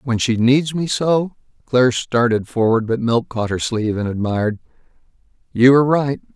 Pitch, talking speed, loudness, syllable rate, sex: 120 Hz, 170 wpm, -17 LUFS, 5.1 syllables/s, male